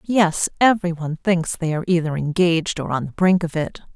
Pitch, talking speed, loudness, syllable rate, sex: 170 Hz, 210 wpm, -20 LUFS, 5.9 syllables/s, female